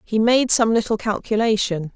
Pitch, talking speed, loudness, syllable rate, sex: 220 Hz, 155 wpm, -19 LUFS, 4.9 syllables/s, female